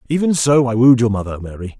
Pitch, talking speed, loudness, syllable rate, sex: 120 Hz, 235 wpm, -14 LUFS, 6.3 syllables/s, male